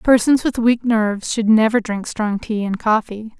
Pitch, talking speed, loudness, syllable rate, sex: 220 Hz, 195 wpm, -18 LUFS, 4.5 syllables/s, female